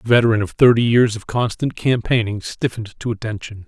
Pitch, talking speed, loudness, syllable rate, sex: 110 Hz, 180 wpm, -18 LUFS, 5.9 syllables/s, male